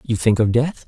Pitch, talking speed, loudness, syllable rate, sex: 120 Hz, 275 wpm, -18 LUFS, 5.2 syllables/s, male